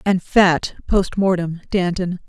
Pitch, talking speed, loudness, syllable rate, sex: 180 Hz, 105 wpm, -19 LUFS, 3.7 syllables/s, female